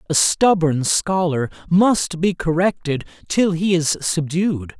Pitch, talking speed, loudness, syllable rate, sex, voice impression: 170 Hz, 125 wpm, -19 LUFS, 3.6 syllables/s, male, very masculine, very middle-aged, very thick, very tensed, very powerful, very bright, soft, very clear, muffled, cool, slightly intellectual, refreshing, very sincere, very calm, mature, very friendly, very reassuring, very unique, slightly elegant, very wild, sweet, very lively, very kind, very intense